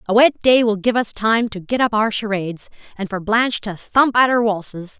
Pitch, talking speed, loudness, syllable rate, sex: 220 Hz, 240 wpm, -17 LUFS, 5.2 syllables/s, female